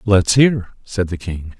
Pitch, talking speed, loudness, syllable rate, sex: 100 Hz, 190 wpm, -17 LUFS, 3.8 syllables/s, male